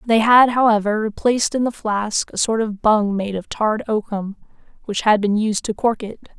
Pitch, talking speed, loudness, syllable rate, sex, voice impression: 215 Hz, 205 wpm, -18 LUFS, 5.0 syllables/s, female, very feminine, slightly gender-neutral, slightly young, slightly adult-like, very thin, very tensed, powerful, bright, very hard, very clear, fluent, very cool, intellectual, very refreshing, sincere, calm, very friendly, reassuring, slightly unique, elegant, slightly wild, sweet, slightly lively, slightly strict, slightly intense, slightly sharp